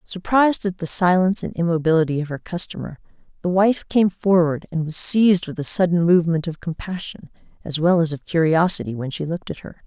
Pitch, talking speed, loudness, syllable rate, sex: 170 Hz, 195 wpm, -20 LUFS, 5.9 syllables/s, female